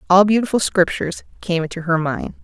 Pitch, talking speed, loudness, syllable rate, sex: 185 Hz, 175 wpm, -18 LUFS, 5.9 syllables/s, female